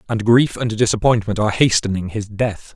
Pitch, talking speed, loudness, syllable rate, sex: 110 Hz, 175 wpm, -18 LUFS, 5.5 syllables/s, male